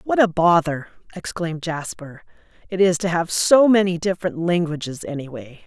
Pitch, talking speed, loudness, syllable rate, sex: 170 Hz, 150 wpm, -20 LUFS, 5.2 syllables/s, female